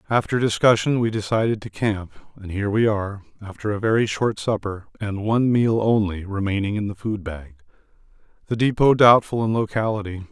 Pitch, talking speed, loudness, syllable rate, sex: 105 Hz, 170 wpm, -21 LUFS, 5.6 syllables/s, male